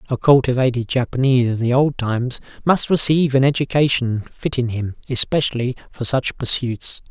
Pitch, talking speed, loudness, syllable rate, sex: 130 Hz, 145 wpm, -19 LUFS, 5.4 syllables/s, male